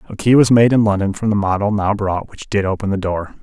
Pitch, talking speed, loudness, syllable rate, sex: 100 Hz, 280 wpm, -16 LUFS, 6.0 syllables/s, male